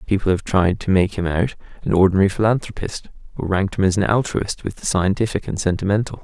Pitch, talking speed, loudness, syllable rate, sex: 95 Hz, 200 wpm, -20 LUFS, 6.3 syllables/s, male